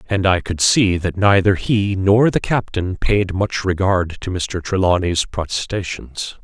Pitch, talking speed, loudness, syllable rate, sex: 95 Hz, 160 wpm, -18 LUFS, 4.0 syllables/s, male